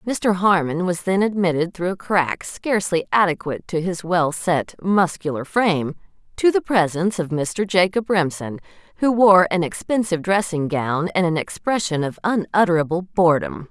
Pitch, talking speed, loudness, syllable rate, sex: 175 Hz, 155 wpm, -20 LUFS, 5.0 syllables/s, female